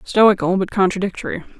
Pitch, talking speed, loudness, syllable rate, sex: 190 Hz, 115 wpm, -18 LUFS, 5.8 syllables/s, female